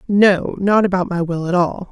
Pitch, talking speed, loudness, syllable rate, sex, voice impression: 185 Hz, 220 wpm, -17 LUFS, 4.7 syllables/s, female, very feminine, very adult-like, thin, very tensed, very powerful, slightly bright, slightly soft, very clear, fluent, raspy, cool, intellectual, refreshing, slightly sincere, calm, friendly, reassuring, unique, elegant, slightly wild, sweet, lively, very kind, modest